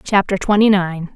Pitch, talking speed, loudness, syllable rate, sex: 195 Hz, 155 wpm, -16 LUFS, 4.8 syllables/s, female